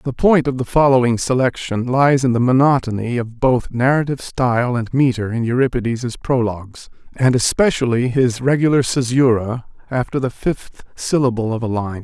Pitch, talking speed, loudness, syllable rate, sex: 125 Hz, 155 wpm, -17 LUFS, 5.1 syllables/s, male